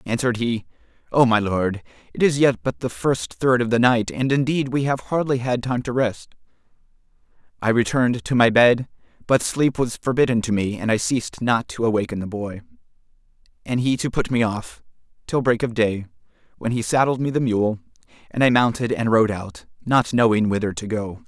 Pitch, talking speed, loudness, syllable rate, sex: 115 Hz, 195 wpm, -21 LUFS, 5.3 syllables/s, male